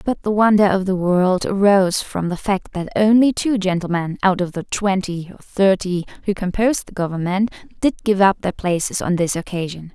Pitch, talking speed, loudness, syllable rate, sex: 190 Hz, 195 wpm, -19 LUFS, 5.1 syllables/s, female